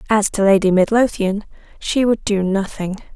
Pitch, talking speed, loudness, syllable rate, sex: 205 Hz, 150 wpm, -17 LUFS, 4.9 syllables/s, female